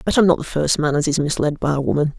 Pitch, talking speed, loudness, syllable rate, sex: 155 Hz, 330 wpm, -19 LUFS, 6.7 syllables/s, female